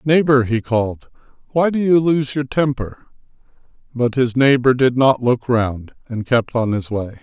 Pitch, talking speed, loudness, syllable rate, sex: 125 Hz, 175 wpm, -17 LUFS, 4.5 syllables/s, male